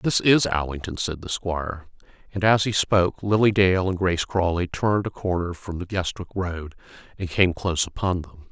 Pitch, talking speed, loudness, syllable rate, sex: 90 Hz, 190 wpm, -23 LUFS, 5.2 syllables/s, male